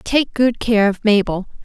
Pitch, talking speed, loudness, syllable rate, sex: 220 Hz, 185 wpm, -17 LUFS, 4.1 syllables/s, female